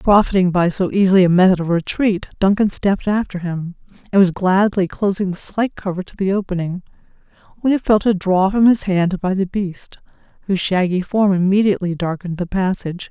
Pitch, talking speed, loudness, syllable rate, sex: 190 Hz, 185 wpm, -17 LUFS, 5.6 syllables/s, female